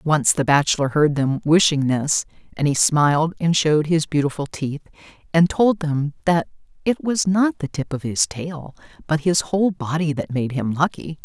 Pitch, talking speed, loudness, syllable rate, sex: 155 Hz, 185 wpm, -20 LUFS, 4.7 syllables/s, female